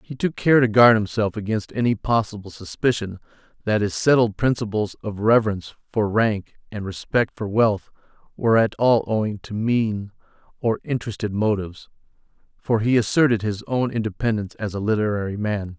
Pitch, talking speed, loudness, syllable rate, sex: 110 Hz, 155 wpm, -21 LUFS, 5.4 syllables/s, male